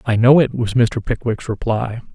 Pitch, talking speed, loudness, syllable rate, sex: 115 Hz, 195 wpm, -17 LUFS, 4.7 syllables/s, male